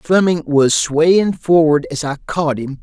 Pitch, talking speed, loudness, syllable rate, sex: 160 Hz, 170 wpm, -15 LUFS, 3.8 syllables/s, male